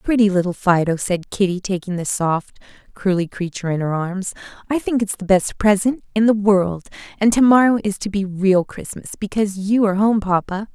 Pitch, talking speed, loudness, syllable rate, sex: 195 Hz, 195 wpm, -19 LUFS, 5.4 syllables/s, female